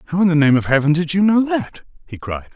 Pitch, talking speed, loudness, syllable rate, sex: 160 Hz, 280 wpm, -17 LUFS, 6.3 syllables/s, male